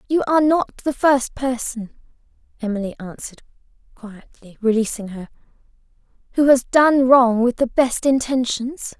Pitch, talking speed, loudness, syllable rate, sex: 250 Hz, 125 wpm, -18 LUFS, 4.7 syllables/s, female